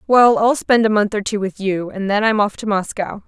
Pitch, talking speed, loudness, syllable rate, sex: 210 Hz, 275 wpm, -17 LUFS, 5.2 syllables/s, female